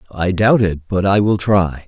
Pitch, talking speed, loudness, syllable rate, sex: 95 Hz, 225 wpm, -16 LUFS, 4.5 syllables/s, male